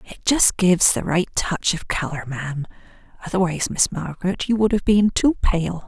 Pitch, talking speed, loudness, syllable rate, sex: 180 Hz, 185 wpm, -20 LUFS, 5.4 syllables/s, female